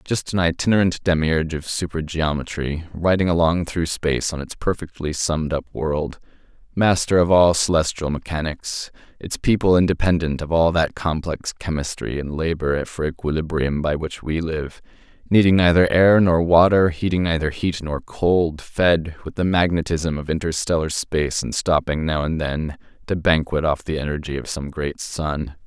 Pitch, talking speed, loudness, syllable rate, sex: 80 Hz, 160 wpm, -21 LUFS, 4.8 syllables/s, male